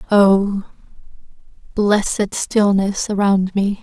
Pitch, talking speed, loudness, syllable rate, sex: 200 Hz, 80 wpm, -17 LUFS, 3.1 syllables/s, female